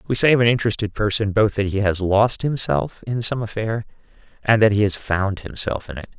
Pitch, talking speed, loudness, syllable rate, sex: 105 Hz, 225 wpm, -20 LUFS, 5.5 syllables/s, male